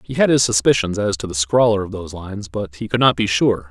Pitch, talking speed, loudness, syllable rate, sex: 100 Hz, 275 wpm, -18 LUFS, 6.1 syllables/s, male